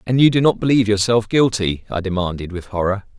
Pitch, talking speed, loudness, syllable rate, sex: 105 Hz, 205 wpm, -18 LUFS, 6.1 syllables/s, male